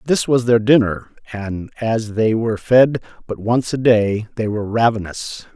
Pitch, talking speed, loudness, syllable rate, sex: 115 Hz, 175 wpm, -17 LUFS, 4.5 syllables/s, male